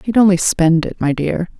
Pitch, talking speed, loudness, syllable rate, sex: 180 Hz, 225 wpm, -15 LUFS, 5.0 syllables/s, female